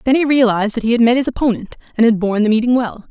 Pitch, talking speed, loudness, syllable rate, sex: 235 Hz, 290 wpm, -15 LUFS, 7.5 syllables/s, female